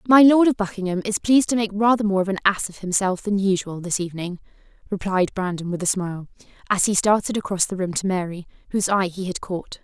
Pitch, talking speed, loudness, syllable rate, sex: 195 Hz, 225 wpm, -21 LUFS, 6.2 syllables/s, female